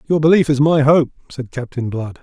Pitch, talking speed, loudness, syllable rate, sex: 140 Hz, 215 wpm, -16 LUFS, 5.4 syllables/s, male